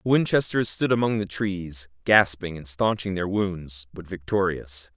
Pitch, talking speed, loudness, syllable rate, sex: 95 Hz, 155 wpm, -24 LUFS, 4.3 syllables/s, male